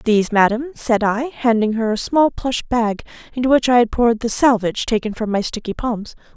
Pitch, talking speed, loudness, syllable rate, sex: 230 Hz, 210 wpm, -18 LUFS, 5.4 syllables/s, female